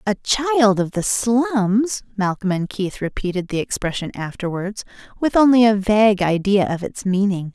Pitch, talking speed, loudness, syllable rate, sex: 205 Hz, 160 wpm, -19 LUFS, 4.5 syllables/s, female